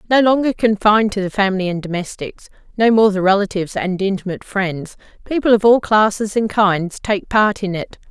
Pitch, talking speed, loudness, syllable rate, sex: 205 Hz, 170 wpm, -17 LUFS, 5.5 syllables/s, female